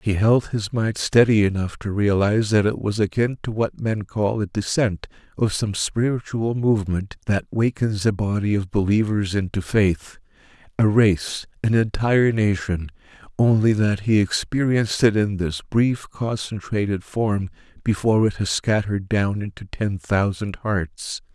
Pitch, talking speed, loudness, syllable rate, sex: 105 Hz, 150 wpm, -21 LUFS, 4.5 syllables/s, male